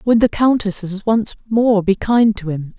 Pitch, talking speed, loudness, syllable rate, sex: 210 Hz, 195 wpm, -16 LUFS, 4.4 syllables/s, female